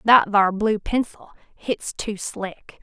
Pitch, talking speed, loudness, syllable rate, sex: 210 Hz, 150 wpm, -22 LUFS, 3.2 syllables/s, female